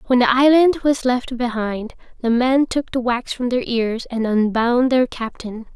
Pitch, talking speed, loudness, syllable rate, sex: 245 Hz, 190 wpm, -18 LUFS, 4.3 syllables/s, female